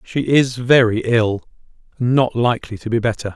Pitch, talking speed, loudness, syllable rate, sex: 120 Hz, 145 wpm, -17 LUFS, 4.8 syllables/s, male